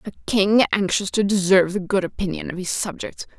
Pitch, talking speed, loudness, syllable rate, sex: 195 Hz, 195 wpm, -20 LUFS, 5.7 syllables/s, female